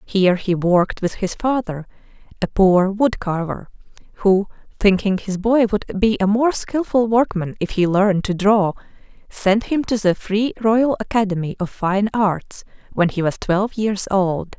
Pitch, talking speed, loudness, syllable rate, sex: 200 Hz, 170 wpm, -19 LUFS, 4.4 syllables/s, female